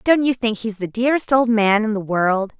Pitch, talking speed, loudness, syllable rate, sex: 225 Hz, 255 wpm, -18 LUFS, 5.3 syllables/s, female